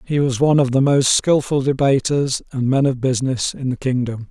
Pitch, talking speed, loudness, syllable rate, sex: 135 Hz, 210 wpm, -18 LUFS, 5.4 syllables/s, male